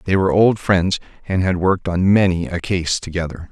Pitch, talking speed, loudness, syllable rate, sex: 90 Hz, 205 wpm, -18 LUFS, 5.5 syllables/s, male